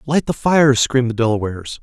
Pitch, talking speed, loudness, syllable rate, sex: 125 Hz, 200 wpm, -16 LUFS, 6.4 syllables/s, male